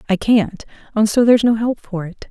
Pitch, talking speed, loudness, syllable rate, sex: 215 Hz, 235 wpm, -17 LUFS, 5.4 syllables/s, female